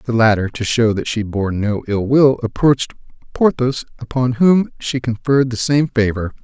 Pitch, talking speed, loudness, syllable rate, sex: 120 Hz, 175 wpm, -17 LUFS, 4.8 syllables/s, male